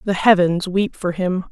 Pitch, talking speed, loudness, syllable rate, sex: 185 Hz, 200 wpm, -18 LUFS, 4.5 syllables/s, female